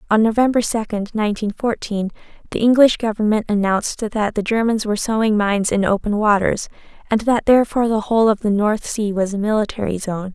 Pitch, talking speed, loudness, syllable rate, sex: 215 Hz, 180 wpm, -18 LUFS, 5.8 syllables/s, female